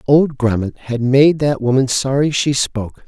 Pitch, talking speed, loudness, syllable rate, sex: 130 Hz, 175 wpm, -16 LUFS, 4.5 syllables/s, male